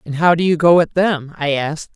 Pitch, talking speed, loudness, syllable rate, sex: 160 Hz, 275 wpm, -16 LUFS, 5.6 syllables/s, female